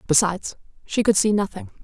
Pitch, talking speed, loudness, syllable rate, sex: 200 Hz, 165 wpm, -21 LUFS, 6.1 syllables/s, female